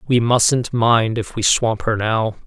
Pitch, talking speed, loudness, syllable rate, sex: 115 Hz, 195 wpm, -17 LUFS, 3.6 syllables/s, male